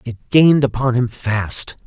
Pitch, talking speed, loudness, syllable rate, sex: 125 Hz, 160 wpm, -17 LUFS, 4.4 syllables/s, male